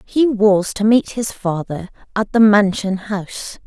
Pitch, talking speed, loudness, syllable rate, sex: 205 Hz, 165 wpm, -17 LUFS, 4.0 syllables/s, female